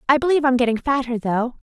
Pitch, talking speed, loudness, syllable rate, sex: 255 Hz, 210 wpm, -20 LUFS, 7.1 syllables/s, female